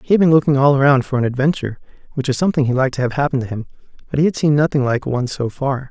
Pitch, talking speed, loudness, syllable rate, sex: 135 Hz, 285 wpm, -17 LUFS, 7.8 syllables/s, male